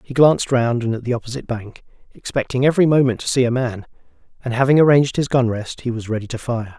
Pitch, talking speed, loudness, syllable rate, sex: 125 Hz, 230 wpm, -18 LUFS, 6.7 syllables/s, male